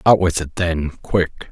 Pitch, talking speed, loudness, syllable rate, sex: 85 Hz, 200 wpm, -19 LUFS, 4.1 syllables/s, male